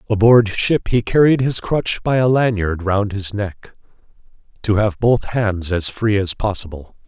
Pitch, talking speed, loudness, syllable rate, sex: 105 Hz, 170 wpm, -17 LUFS, 4.2 syllables/s, male